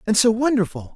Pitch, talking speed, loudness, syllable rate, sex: 215 Hz, 190 wpm, -19 LUFS, 6.3 syllables/s, male